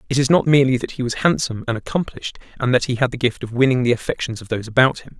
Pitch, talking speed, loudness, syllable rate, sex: 125 Hz, 275 wpm, -19 LUFS, 7.6 syllables/s, male